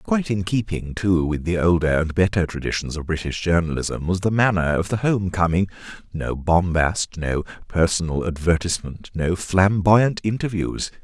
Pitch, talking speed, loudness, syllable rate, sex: 90 Hz, 150 wpm, -21 LUFS, 4.8 syllables/s, male